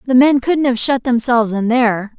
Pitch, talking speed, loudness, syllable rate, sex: 245 Hz, 220 wpm, -15 LUFS, 5.4 syllables/s, female